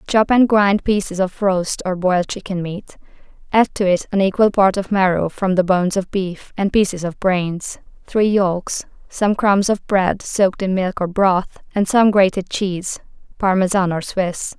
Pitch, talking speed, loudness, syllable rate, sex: 190 Hz, 185 wpm, -18 LUFS, 4.3 syllables/s, female